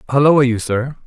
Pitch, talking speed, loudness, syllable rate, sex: 130 Hz, 170 wpm, -15 LUFS, 5.5 syllables/s, male